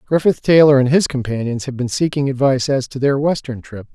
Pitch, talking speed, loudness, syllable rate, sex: 135 Hz, 215 wpm, -16 LUFS, 5.8 syllables/s, male